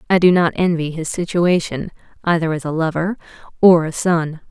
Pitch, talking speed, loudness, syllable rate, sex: 165 Hz, 175 wpm, -17 LUFS, 5.2 syllables/s, female